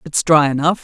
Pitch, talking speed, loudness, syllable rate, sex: 150 Hz, 215 wpm, -14 LUFS, 5.5 syllables/s, female